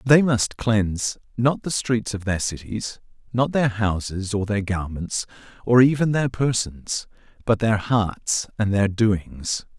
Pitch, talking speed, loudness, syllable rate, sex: 110 Hz, 155 wpm, -22 LUFS, 3.8 syllables/s, male